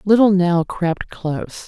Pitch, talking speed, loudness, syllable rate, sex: 180 Hz, 145 wpm, -18 LUFS, 3.8 syllables/s, female